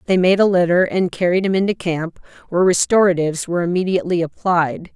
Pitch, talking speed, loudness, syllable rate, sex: 175 Hz, 170 wpm, -17 LUFS, 6.2 syllables/s, female